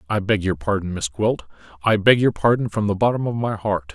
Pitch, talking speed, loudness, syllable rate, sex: 105 Hz, 245 wpm, -20 LUFS, 5.6 syllables/s, male